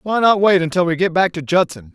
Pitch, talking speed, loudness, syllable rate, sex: 175 Hz, 280 wpm, -16 LUFS, 5.8 syllables/s, male